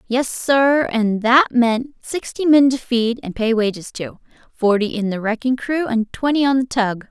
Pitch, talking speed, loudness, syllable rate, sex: 245 Hz, 185 wpm, -18 LUFS, 4.3 syllables/s, female